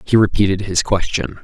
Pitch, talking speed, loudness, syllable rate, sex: 100 Hz, 165 wpm, -17 LUFS, 5.3 syllables/s, male